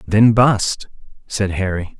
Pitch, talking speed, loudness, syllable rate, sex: 100 Hz, 120 wpm, -16 LUFS, 3.4 syllables/s, male